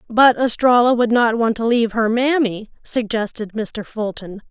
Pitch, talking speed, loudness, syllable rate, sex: 230 Hz, 160 wpm, -18 LUFS, 4.7 syllables/s, female